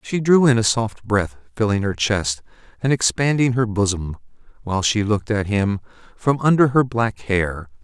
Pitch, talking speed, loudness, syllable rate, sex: 110 Hz, 175 wpm, -20 LUFS, 4.8 syllables/s, male